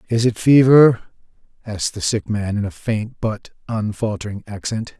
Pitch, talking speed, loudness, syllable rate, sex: 110 Hz, 155 wpm, -18 LUFS, 4.8 syllables/s, male